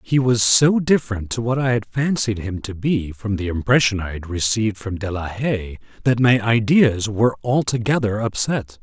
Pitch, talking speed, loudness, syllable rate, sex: 110 Hz, 190 wpm, -19 LUFS, 4.9 syllables/s, male